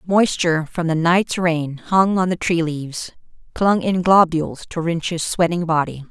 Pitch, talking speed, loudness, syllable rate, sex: 170 Hz, 165 wpm, -19 LUFS, 4.4 syllables/s, female